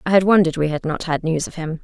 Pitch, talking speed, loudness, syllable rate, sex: 165 Hz, 330 wpm, -19 LUFS, 7.0 syllables/s, female